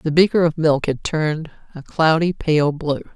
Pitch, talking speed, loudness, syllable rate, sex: 155 Hz, 190 wpm, -19 LUFS, 4.7 syllables/s, female